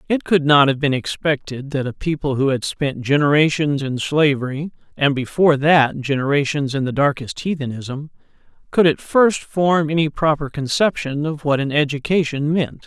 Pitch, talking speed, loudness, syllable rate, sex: 145 Hz, 165 wpm, -18 LUFS, 4.9 syllables/s, male